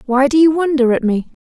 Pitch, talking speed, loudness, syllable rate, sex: 275 Hz, 250 wpm, -14 LUFS, 6.0 syllables/s, female